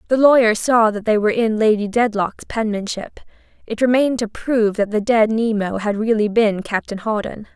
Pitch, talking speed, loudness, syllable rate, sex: 220 Hz, 185 wpm, -18 LUFS, 5.3 syllables/s, female